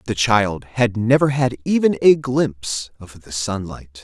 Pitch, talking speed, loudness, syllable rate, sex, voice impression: 115 Hz, 165 wpm, -19 LUFS, 4.1 syllables/s, male, very masculine, middle-aged, very thick, very tensed, very powerful, bright, soft, very clear, very fluent, slightly raspy, very cool, intellectual, refreshing, sincere, very calm, very mature, very friendly, reassuring, very unique, slightly elegant, wild, sweet, lively, very kind, slightly intense